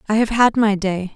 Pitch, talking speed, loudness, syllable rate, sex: 210 Hz, 260 wpm, -17 LUFS, 5.2 syllables/s, female